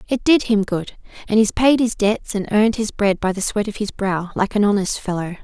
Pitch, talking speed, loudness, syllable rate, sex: 210 Hz, 255 wpm, -19 LUFS, 5.4 syllables/s, female